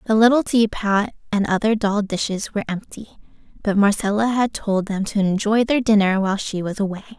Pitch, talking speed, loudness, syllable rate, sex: 205 Hz, 185 wpm, -20 LUFS, 5.5 syllables/s, female